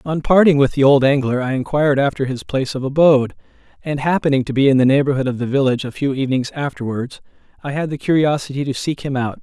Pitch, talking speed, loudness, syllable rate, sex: 140 Hz, 225 wpm, -17 LUFS, 6.7 syllables/s, male